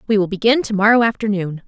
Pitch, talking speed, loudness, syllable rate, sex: 210 Hz, 215 wpm, -16 LUFS, 6.7 syllables/s, female